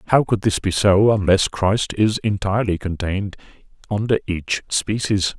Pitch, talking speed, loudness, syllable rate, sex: 100 Hz, 145 wpm, -19 LUFS, 4.8 syllables/s, male